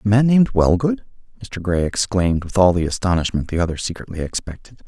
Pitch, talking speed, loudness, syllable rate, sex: 95 Hz, 185 wpm, -19 LUFS, 6.3 syllables/s, male